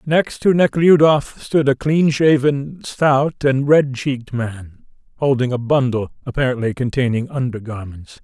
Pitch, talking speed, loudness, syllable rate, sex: 135 Hz, 140 wpm, -17 LUFS, 4.3 syllables/s, male